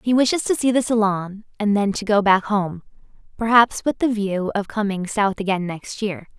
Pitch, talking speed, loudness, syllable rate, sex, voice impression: 210 Hz, 205 wpm, -20 LUFS, 4.9 syllables/s, female, very feminine, very young, very thin, tensed, powerful, bright, slightly soft, very clear, very fluent, slightly raspy, very cute, intellectual, very refreshing, sincere, slightly calm, very friendly, very reassuring, very unique, elegant, slightly wild, sweet, very lively, kind, intense, very light